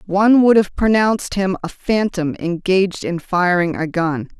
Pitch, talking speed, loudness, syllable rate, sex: 185 Hz, 165 wpm, -17 LUFS, 4.6 syllables/s, female